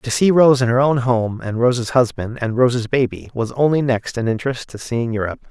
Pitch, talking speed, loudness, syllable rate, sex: 125 Hz, 230 wpm, -18 LUFS, 5.6 syllables/s, male